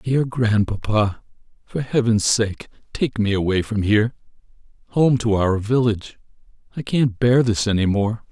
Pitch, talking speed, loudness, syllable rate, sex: 110 Hz, 145 wpm, -20 LUFS, 4.5 syllables/s, male